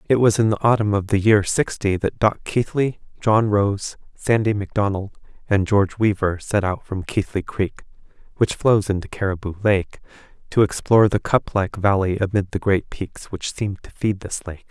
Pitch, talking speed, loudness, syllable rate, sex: 100 Hz, 185 wpm, -21 LUFS, 4.8 syllables/s, male